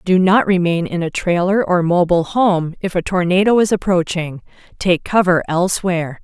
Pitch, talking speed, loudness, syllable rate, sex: 180 Hz, 165 wpm, -16 LUFS, 5.1 syllables/s, female